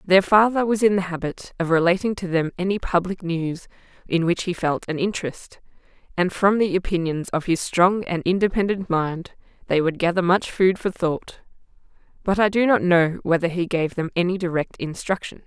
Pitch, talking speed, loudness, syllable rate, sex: 180 Hz, 185 wpm, -22 LUFS, 5.1 syllables/s, female